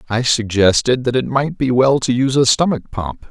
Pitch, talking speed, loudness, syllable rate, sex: 125 Hz, 220 wpm, -16 LUFS, 5.1 syllables/s, male